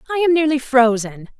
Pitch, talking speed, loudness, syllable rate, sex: 270 Hz, 170 wpm, -16 LUFS, 5.6 syllables/s, female